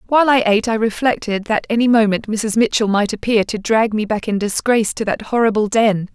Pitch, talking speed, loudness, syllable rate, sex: 220 Hz, 215 wpm, -17 LUFS, 5.8 syllables/s, female